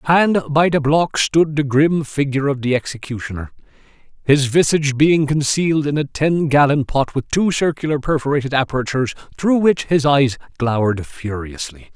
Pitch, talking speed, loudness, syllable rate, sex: 145 Hz, 150 wpm, -17 LUFS, 5.1 syllables/s, male